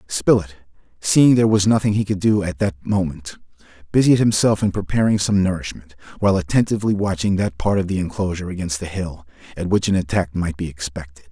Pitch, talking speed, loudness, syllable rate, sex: 95 Hz, 185 wpm, -19 LUFS, 6.1 syllables/s, male